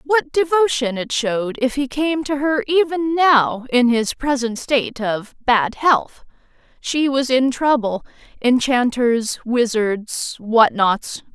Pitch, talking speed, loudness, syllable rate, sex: 260 Hz, 130 wpm, -18 LUFS, 3.6 syllables/s, female